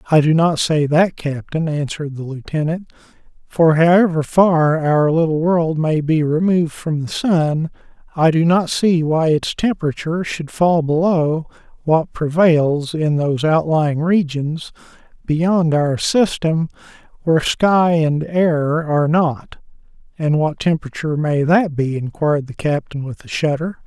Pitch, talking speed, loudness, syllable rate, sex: 160 Hz, 145 wpm, -17 LUFS, 4.3 syllables/s, male